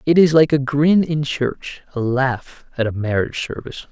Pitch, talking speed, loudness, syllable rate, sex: 140 Hz, 200 wpm, -18 LUFS, 4.8 syllables/s, male